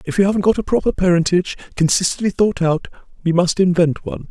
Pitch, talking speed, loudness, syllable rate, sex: 175 Hz, 195 wpm, -17 LUFS, 6.6 syllables/s, male